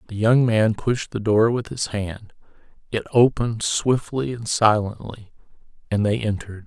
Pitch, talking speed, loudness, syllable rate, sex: 110 Hz, 155 wpm, -21 LUFS, 4.6 syllables/s, male